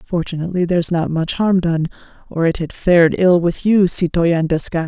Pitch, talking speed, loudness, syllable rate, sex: 170 Hz, 185 wpm, -16 LUFS, 5.3 syllables/s, female